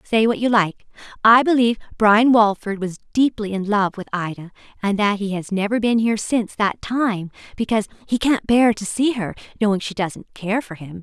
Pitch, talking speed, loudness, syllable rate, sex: 210 Hz, 200 wpm, -19 LUFS, 5.4 syllables/s, female